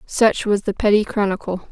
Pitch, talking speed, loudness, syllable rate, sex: 205 Hz, 175 wpm, -19 LUFS, 5.0 syllables/s, female